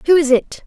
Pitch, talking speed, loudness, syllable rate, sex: 300 Hz, 270 wpm, -15 LUFS, 6.1 syllables/s, female